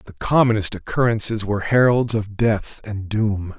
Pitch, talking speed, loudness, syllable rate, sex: 110 Hz, 150 wpm, -20 LUFS, 4.7 syllables/s, male